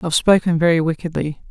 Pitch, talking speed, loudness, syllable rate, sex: 165 Hz, 160 wpm, -17 LUFS, 6.7 syllables/s, female